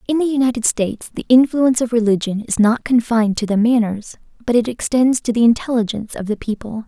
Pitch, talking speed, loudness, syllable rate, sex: 230 Hz, 200 wpm, -17 LUFS, 6.1 syllables/s, female